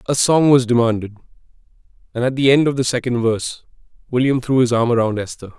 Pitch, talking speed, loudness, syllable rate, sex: 125 Hz, 195 wpm, -17 LUFS, 6.1 syllables/s, male